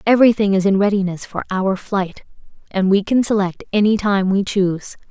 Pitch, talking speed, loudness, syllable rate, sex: 200 Hz, 175 wpm, -18 LUFS, 5.4 syllables/s, female